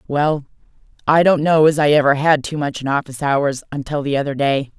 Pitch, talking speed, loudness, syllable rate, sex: 145 Hz, 200 wpm, -17 LUFS, 5.7 syllables/s, female